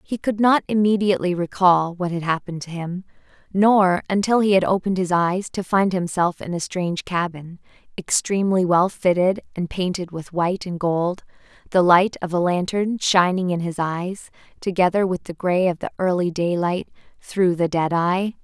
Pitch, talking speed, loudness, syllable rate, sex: 180 Hz, 175 wpm, -21 LUFS, 5.0 syllables/s, female